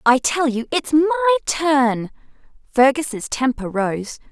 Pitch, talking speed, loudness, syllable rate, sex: 250 Hz, 125 wpm, -19 LUFS, 3.6 syllables/s, female